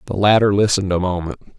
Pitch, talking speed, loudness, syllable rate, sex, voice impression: 95 Hz, 190 wpm, -17 LUFS, 7.3 syllables/s, male, masculine, adult-like, tensed, powerful, clear, cool, sincere, slightly friendly, wild, lively, slightly strict